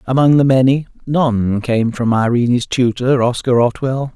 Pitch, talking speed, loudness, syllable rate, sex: 125 Hz, 145 wpm, -15 LUFS, 4.4 syllables/s, male